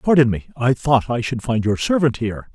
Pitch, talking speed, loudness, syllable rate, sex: 125 Hz, 235 wpm, -19 LUFS, 5.7 syllables/s, male